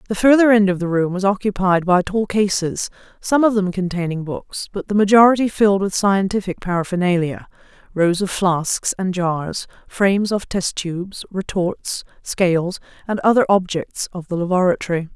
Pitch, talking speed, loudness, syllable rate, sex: 190 Hz, 160 wpm, -18 LUFS, 5.0 syllables/s, female